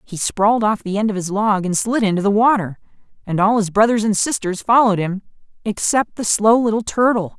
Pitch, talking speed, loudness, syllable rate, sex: 210 Hz, 210 wpm, -17 LUFS, 5.7 syllables/s, female